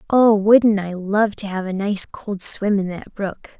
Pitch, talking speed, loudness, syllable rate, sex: 200 Hz, 215 wpm, -19 LUFS, 3.9 syllables/s, female